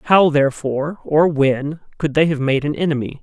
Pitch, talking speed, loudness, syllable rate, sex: 150 Hz, 185 wpm, -18 LUFS, 5.2 syllables/s, male